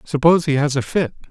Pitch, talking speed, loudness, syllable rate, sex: 145 Hz, 230 wpm, -18 LUFS, 6.6 syllables/s, male